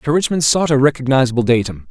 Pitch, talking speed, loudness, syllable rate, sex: 135 Hz, 190 wpm, -15 LUFS, 6.6 syllables/s, male